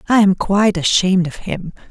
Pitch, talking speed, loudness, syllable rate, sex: 190 Hz, 190 wpm, -16 LUFS, 5.7 syllables/s, male